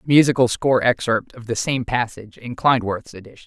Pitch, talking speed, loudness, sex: 120 Hz, 175 wpm, -20 LUFS, female